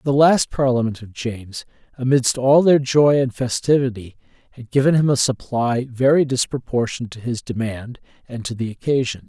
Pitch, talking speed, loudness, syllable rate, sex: 125 Hz, 160 wpm, -19 LUFS, 5.1 syllables/s, male